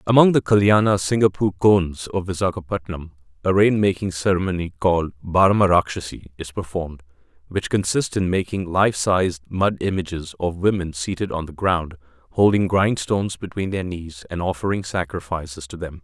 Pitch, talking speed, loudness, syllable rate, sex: 90 Hz, 140 wpm, -21 LUFS, 5.2 syllables/s, male